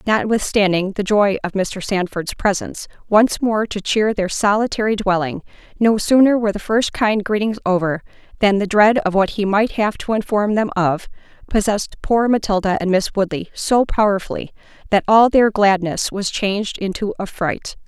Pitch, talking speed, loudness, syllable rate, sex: 205 Hz, 170 wpm, -18 LUFS, 5.0 syllables/s, female